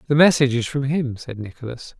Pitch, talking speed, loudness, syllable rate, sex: 130 Hz, 210 wpm, -20 LUFS, 6.1 syllables/s, male